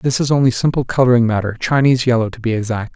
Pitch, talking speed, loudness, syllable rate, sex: 120 Hz, 225 wpm, -16 LUFS, 6.9 syllables/s, male